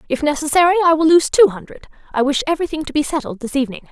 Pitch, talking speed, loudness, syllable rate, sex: 300 Hz, 230 wpm, -16 LUFS, 7.6 syllables/s, female